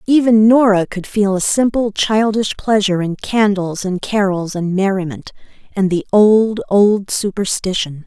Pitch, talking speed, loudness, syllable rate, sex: 200 Hz, 140 wpm, -15 LUFS, 4.3 syllables/s, female